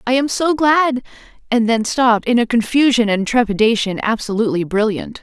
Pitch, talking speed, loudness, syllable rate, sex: 235 Hz, 160 wpm, -16 LUFS, 5.4 syllables/s, female